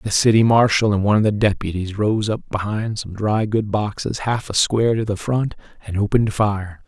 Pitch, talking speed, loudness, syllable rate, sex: 105 Hz, 210 wpm, -19 LUFS, 5.3 syllables/s, male